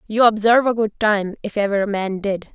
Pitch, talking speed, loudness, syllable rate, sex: 210 Hz, 235 wpm, -19 LUFS, 5.7 syllables/s, female